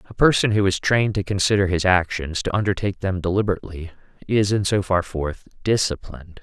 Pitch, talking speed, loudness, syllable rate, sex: 95 Hz, 175 wpm, -21 LUFS, 6.0 syllables/s, male